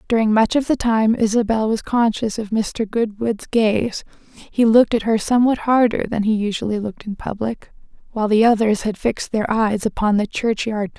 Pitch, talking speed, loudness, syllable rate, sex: 220 Hz, 190 wpm, -19 LUFS, 5.3 syllables/s, female